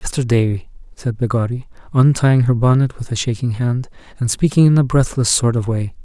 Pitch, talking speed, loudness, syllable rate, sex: 120 Hz, 190 wpm, -17 LUFS, 5.4 syllables/s, male